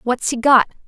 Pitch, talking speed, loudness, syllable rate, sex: 250 Hz, 205 wpm, -16 LUFS, 5.0 syllables/s, female